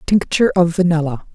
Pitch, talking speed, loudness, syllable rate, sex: 170 Hz, 135 wpm, -16 LUFS, 5.9 syllables/s, female